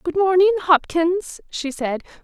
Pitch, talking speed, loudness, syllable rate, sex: 340 Hz, 135 wpm, -19 LUFS, 4.2 syllables/s, female